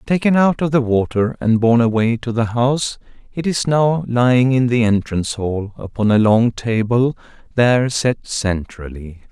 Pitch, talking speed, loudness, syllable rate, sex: 120 Hz, 170 wpm, -17 LUFS, 4.7 syllables/s, male